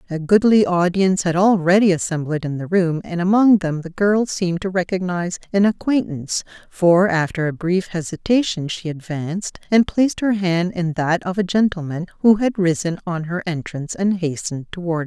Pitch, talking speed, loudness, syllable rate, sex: 180 Hz, 180 wpm, -19 LUFS, 5.3 syllables/s, female